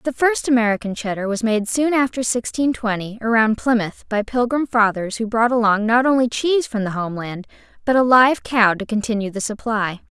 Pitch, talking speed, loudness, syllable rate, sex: 230 Hz, 190 wpm, -19 LUFS, 5.4 syllables/s, female